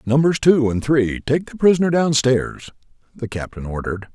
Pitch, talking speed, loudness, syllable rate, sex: 135 Hz, 175 wpm, -18 LUFS, 5.1 syllables/s, male